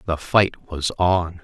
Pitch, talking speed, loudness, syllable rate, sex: 85 Hz, 165 wpm, -20 LUFS, 3.2 syllables/s, male